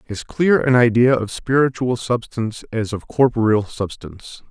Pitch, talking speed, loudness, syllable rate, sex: 120 Hz, 145 wpm, -18 LUFS, 4.8 syllables/s, male